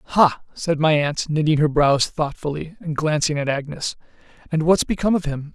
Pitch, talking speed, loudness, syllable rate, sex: 155 Hz, 185 wpm, -21 LUFS, 4.9 syllables/s, male